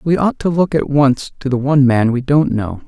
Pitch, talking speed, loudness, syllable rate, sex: 135 Hz, 270 wpm, -15 LUFS, 5.1 syllables/s, male